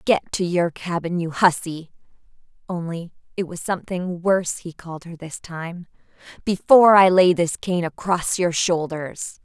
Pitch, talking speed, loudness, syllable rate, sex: 175 Hz, 155 wpm, -20 LUFS, 5.3 syllables/s, female